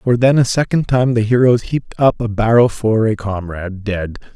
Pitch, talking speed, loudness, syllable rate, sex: 115 Hz, 205 wpm, -15 LUFS, 5.1 syllables/s, male